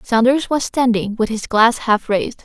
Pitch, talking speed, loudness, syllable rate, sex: 230 Hz, 195 wpm, -17 LUFS, 4.7 syllables/s, female